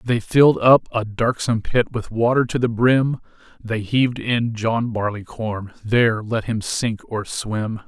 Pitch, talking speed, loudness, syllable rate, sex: 115 Hz, 170 wpm, -20 LUFS, 4.2 syllables/s, male